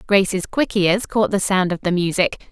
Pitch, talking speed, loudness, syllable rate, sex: 190 Hz, 215 wpm, -19 LUFS, 4.6 syllables/s, female